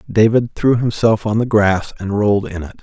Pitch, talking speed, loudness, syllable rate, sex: 105 Hz, 210 wpm, -16 LUFS, 5.2 syllables/s, male